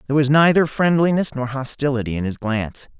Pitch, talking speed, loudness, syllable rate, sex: 135 Hz, 180 wpm, -19 LUFS, 6.2 syllables/s, male